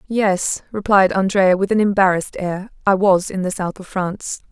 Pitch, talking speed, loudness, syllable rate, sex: 190 Hz, 185 wpm, -18 LUFS, 5.0 syllables/s, female